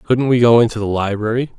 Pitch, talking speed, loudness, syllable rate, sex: 115 Hz, 225 wpm, -15 LUFS, 5.9 syllables/s, male